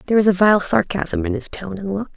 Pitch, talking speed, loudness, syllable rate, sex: 205 Hz, 280 wpm, -19 LUFS, 6.1 syllables/s, female